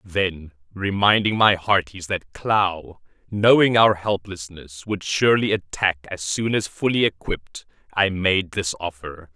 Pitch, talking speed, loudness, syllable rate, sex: 95 Hz, 135 wpm, -21 LUFS, 4.0 syllables/s, male